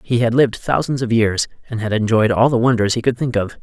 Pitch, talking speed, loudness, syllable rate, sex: 115 Hz, 265 wpm, -17 LUFS, 6.0 syllables/s, male